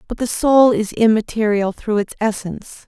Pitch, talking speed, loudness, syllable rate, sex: 220 Hz, 165 wpm, -17 LUFS, 5.1 syllables/s, female